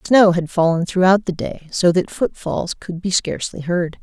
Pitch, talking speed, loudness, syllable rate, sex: 180 Hz, 195 wpm, -18 LUFS, 4.7 syllables/s, female